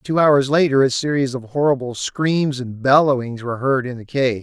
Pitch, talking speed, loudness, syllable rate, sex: 135 Hz, 205 wpm, -18 LUFS, 5.0 syllables/s, male